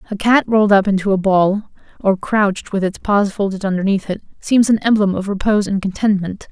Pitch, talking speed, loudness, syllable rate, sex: 200 Hz, 205 wpm, -16 LUFS, 5.6 syllables/s, female